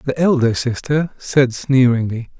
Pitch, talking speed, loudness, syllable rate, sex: 130 Hz, 125 wpm, -17 LUFS, 4.0 syllables/s, male